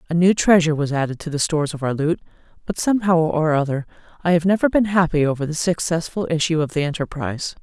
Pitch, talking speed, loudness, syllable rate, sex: 160 Hz, 210 wpm, -20 LUFS, 6.6 syllables/s, female